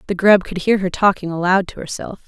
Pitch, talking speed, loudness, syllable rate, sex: 185 Hz, 235 wpm, -17 LUFS, 5.8 syllables/s, female